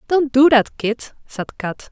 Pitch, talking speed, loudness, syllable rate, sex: 255 Hz, 190 wpm, -17 LUFS, 3.7 syllables/s, female